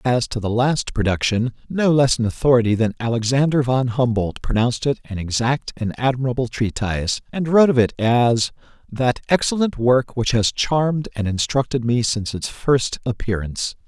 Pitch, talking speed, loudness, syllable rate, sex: 120 Hz, 165 wpm, -20 LUFS, 5.1 syllables/s, male